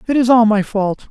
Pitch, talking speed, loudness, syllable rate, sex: 225 Hz, 270 wpm, -14 LUFS, 5.3 syllables/s, male